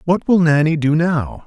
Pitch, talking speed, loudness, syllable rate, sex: 160 Hz, 205 wpm, -16 LUFS, 4.4 syllables/s, male